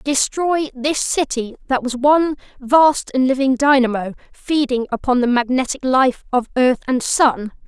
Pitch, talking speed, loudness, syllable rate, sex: 265 Hz, 150 wpm, -17 LUFS, 4.4 syllables/s, female